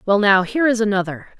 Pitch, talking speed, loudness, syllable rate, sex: 210 Hz, 215 wpm, -17 LUFS, 6.8 syllables/s, female